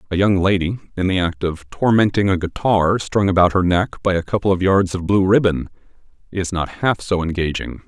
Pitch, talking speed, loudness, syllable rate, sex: 95 Hz, 205 wpm, -18 LUFS, 5.3 syllables/s, male